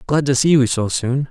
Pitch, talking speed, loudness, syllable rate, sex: 135 Hz, 275 wpm, -17 LUFS, 5.1 syllables/s, male